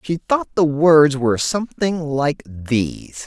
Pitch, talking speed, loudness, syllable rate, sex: 150 Hz, 145 wpm, -18 LUFS, 3.9 syllables/s, male